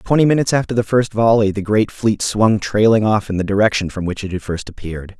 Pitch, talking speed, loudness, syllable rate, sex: 105 Hz, 245 wpm, -17 LUFS, 6.0 syllables/s, male